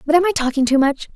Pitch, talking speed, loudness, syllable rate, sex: 300 Hz, 310 wpm, -17 LUFS, 7.5 syllables/s, female